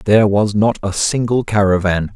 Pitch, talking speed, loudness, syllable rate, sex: 105 Hz, 165 wpm, -15 LUFS, 4.8 syllables/s, male